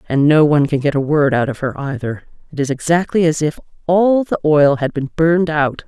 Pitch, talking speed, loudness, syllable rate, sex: 150 Hz, 235 wpm, -16 LUFS, 5.5 syllables/s, female